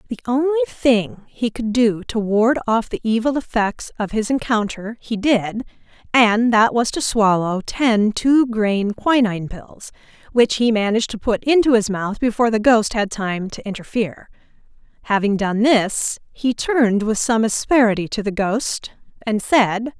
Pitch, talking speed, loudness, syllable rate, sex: 225 Hz, 165 wpm, -18 LUFS, 4.4 syllables/s, female